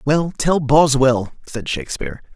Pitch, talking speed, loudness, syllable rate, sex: 135 Hz, 125 wpm, -18 LUFS, 4.6 syllables/s, male